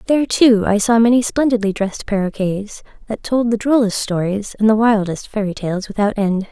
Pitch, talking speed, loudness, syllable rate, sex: 215 Hz, 185 wpm, -17 LUFS, 5.3 syllables/s, female